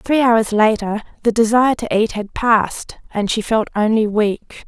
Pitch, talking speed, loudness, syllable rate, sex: 220 Hz, 180 wpm, -17 LUFS, 4.5 syllables/s, female